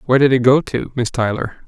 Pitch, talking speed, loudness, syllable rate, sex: 125 Hz, 250 wpm, -16 LUFS, 6.4 syllables/s, male